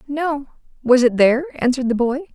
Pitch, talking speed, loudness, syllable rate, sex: 270 Hz, 180 wpm, -18 LUFS, 5.8 syllables/s, female